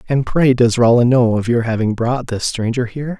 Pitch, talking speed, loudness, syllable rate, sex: 120 Hz, 225 wpm, -16 LUFS, 5.3 syllables/s, male